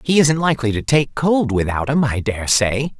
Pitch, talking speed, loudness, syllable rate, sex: 130 Hz, 220 wpm, -17 LUFS, 4.9 syllables/s, male